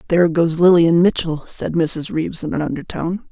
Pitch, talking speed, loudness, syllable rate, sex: 165 Hz, 180 wpm, -17 LUFS, 5.5 syllables/s, female